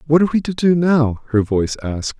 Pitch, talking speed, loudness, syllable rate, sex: 140 Hz, 245 wpm, -17 LUFS, 6.4 syllables/s, male